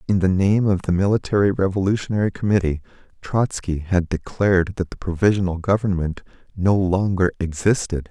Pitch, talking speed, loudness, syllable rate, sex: 95 Hz, 135 wpm, -20 LUFS, 5.5 syllables/s, male